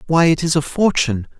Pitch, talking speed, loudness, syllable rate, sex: 155 Hz, 215 wpm, -17 LUFS, 6.2 syllables/s, male